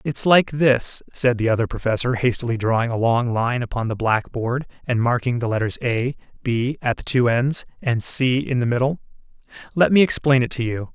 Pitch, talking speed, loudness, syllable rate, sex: 125 Hz, 205 wpm, -20 LUFS, 5.1 syllables/s, male